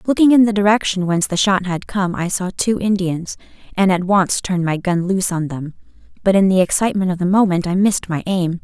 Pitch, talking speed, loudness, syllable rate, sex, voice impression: 185 Hz, 230 wpm, -17 LUFS, 5.9 syllables/s, female, feminine, adult-like, tensed, powerful, slightly bright, clear, fluent, intellectual, friendly, elegant, lively, slightly strict, slightly sharp